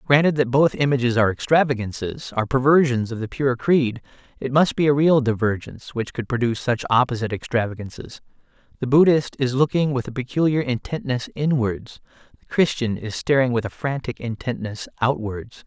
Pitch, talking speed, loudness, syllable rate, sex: 125 Hz, 160 wpm, -21 LUFS, 5.6 syllables/s, male